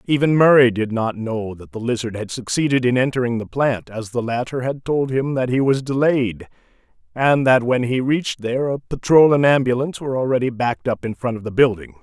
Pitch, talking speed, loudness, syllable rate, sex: 125 Hz, 215 wpm, -19 LUFS, 5.6 syllables/s, male